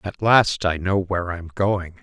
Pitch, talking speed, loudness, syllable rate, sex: 95 Hz, 210 wpm, -21 LUFS, 4.3 syllables/s, male